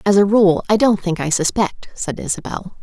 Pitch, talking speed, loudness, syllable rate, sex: 195 Hz, 210 wpm, -17 LUFS, 5.0 syllables/s, female